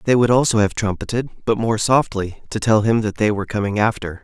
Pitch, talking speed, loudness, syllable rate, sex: 110 Hz, 225 wpm, -19 LUFS, 5.7 syllables/s, male